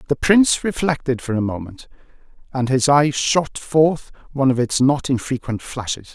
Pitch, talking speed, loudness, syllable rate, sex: 135 Hz, 165 wpm, -19 LUFS, 4.9 syllables/s, male